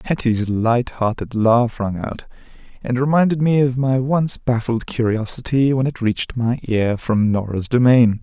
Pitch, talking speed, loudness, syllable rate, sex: 120 Hz, 155 wpm, -18 LUFS, 4.4 syllables/s, male